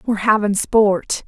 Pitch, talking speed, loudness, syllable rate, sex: 210 Hz, 140 wpm, -17 LUFS, 4.3 syllables/s, female